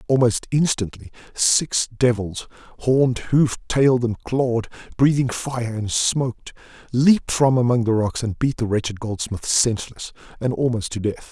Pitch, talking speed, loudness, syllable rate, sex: 120 Hz, 150 wpm, -20 LUFS, 4.8 syllables/s, male